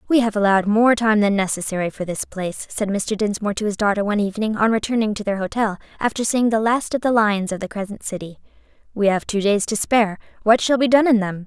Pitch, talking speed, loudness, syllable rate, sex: 210 Hz, 240 wpm, -20 LUFS, 6.4 syllables/s, female